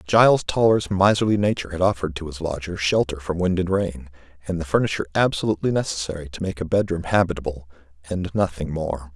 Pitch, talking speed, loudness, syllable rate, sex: 90 Hz, 170 wpm, -22 LUFS, 6.5 syllables/s, male